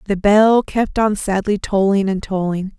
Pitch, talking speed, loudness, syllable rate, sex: 200 Hz, 170 wpm, -17 LUFS, 4.2 syllables/s, female